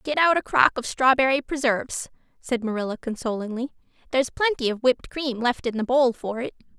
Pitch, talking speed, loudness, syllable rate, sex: 250 Hz, 185 wpm, -23 LUFS, 5.9 syllables/s, female